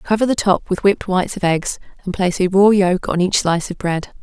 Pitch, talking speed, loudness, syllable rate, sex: 190 Hz, 255 wpm, -17 LUFS, 6.0 syllables/s, female